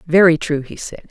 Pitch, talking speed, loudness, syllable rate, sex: 165 Hz, 215 wpm, -16 LUFS, 5.4 syllables/s, female